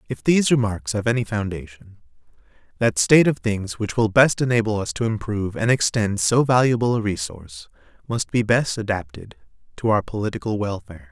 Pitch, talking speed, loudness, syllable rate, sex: 105 Hz, 165 wpm, -21 LUFS, 5.7 syllables/s, male